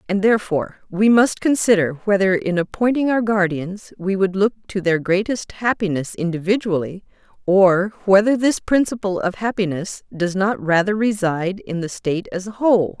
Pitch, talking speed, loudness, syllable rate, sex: 195 Hz, 155 wpm, -19 LUFS, 5.0 syllables/s, female